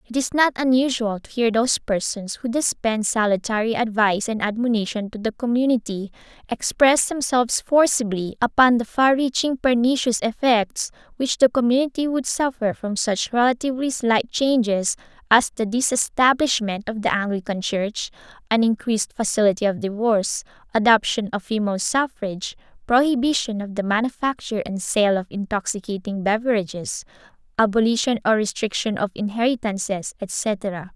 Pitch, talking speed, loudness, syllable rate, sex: 225 Hz, 130 wpm, -21 LUFS, 5.2 syllables/s, female